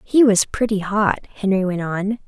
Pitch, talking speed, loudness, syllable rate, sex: 200 Hz, 185 wpm, -19 LUFS, 4.6 syllables/s, female